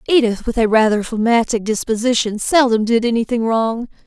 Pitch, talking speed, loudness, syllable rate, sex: 230 Hz, 150 wpm, -16 LUFS, 5.4 syllables/s, female